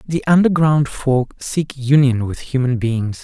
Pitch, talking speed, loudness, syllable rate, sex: 135 Hz, 150 wpm, -17 LUFS, 4.1 syllables/s, male